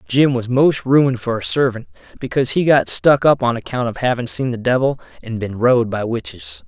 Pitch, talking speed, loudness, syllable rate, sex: 120 Hz, 215 wpm, -17 LUFS, 5.4 syllables/s, male